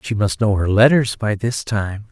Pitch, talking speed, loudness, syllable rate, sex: 105 Hz, 225 wpm, -17 LUFS, 4.5 syllables/s, male